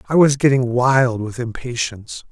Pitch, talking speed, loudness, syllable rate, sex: 125 Hz, 155 wpm, -18 LUFS, 4.8 syllables/s, male